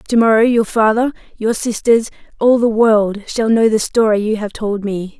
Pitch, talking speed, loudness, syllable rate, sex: 220 Hz, 195 wpm, -15 LUFS, 4.7 syllables/s, female